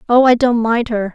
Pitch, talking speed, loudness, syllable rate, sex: 235 Hz, 260 wpm, -14 LUFS, 5.2 syllables/s, female